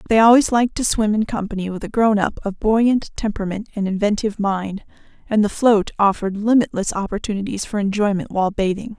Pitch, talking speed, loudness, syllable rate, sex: 210 Hz, 180 wpm, -19 LUFS, 6.0 syllables/s, female